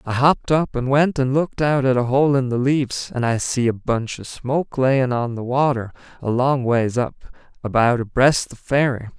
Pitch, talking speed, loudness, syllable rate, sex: 130 Hz, 215 wpm, -20 LUFS, 5.0 syllables/s, male